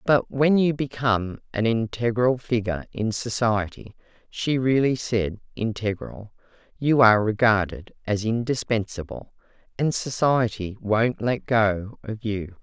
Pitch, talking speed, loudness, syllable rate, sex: 115 Hz, 120 wpm, -23 LUFS, 4.4 syllables/s, female